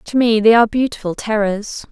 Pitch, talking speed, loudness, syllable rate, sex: 220 Hz, 190 wpm, -16 LUFS, 5.6 syllables/s, female